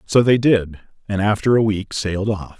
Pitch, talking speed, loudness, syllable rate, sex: 105 Hz, 210 wpm, -18 LUFS, 5.0 syllables/s, male